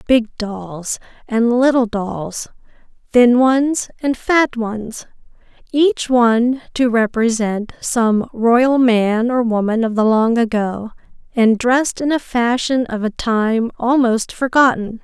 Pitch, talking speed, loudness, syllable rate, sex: 235 Hz, 130 wpm, -16 LUFS, 3.5 syllables/s, female